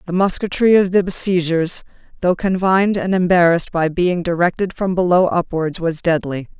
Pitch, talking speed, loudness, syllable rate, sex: 175 Hz, 155 wpm, -17 LUFS, 5.2 syllables/s, female